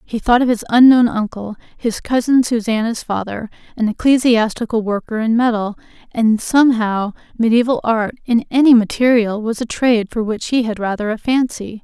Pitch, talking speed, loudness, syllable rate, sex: 230 Hz, 160 wpm, -16 LUFS, 5.2 syllables/s, female